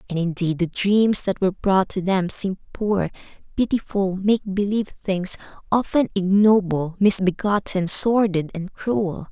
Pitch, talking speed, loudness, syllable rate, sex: 195 Hz, 135 wpm, -21 LUFS, 4.3 syllables/s, female